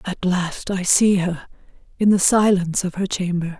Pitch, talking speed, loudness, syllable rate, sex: 185 Hz, 185 wpm, -19 LUFS, 4.7 syllables/s, female